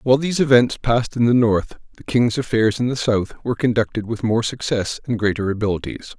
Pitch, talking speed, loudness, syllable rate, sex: 115 Hz, 205 wpm, -19 LUFS, 5.9 syllables/s, male